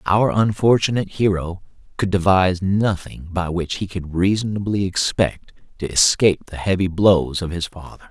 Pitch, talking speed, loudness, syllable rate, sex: 95 Hz, 150 wpm, -19 LUFS, 4.9 syllables/s, male